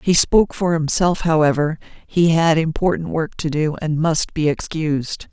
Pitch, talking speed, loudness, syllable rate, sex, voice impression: 160 Hz, 160 wpm, -18 LUFS, 4.7 syllables/s, female, feminine, adult-like, slightly bright, fluent, intellectual, calm, friendly, reassuring, elegant, kind